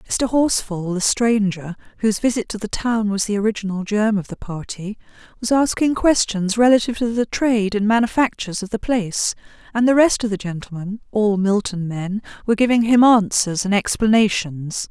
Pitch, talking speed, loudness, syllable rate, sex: 210 Hz, 165 wpm, -19 LUFS, 5.3 syllables/s, female